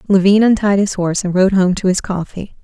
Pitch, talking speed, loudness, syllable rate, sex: 190 Hz, 225 wpm, -14 LUFS, 5.8 syllables/s, female